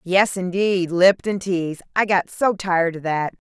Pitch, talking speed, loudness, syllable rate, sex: 185 Hz, 135 wpm, -20 LUFS, 4.2 syllables/s, female